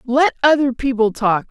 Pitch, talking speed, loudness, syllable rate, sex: 250 Hz, 160 wpm, -16 LUFS, 4.7 syllables/s, female